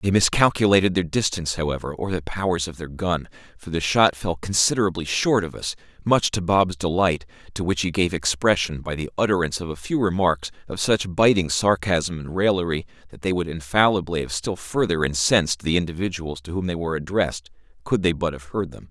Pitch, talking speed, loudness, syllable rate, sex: 90 Hz, 195 wpm, -22 LUFS, 5.7 syllables/s, male